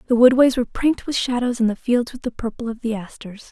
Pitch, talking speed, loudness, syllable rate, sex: 240 Hz, 255 wpm, -20 LUFS, 6.3 syllables/s, female